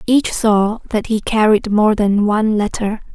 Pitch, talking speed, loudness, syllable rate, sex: 215 Hz, 170 wpm, -16 LUFS, 4.3 syllables/s, female